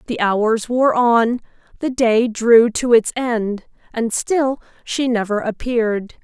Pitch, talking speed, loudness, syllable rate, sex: 230 Hz, 135 wpm, -17 LUFS, 3.6 syllables/s, female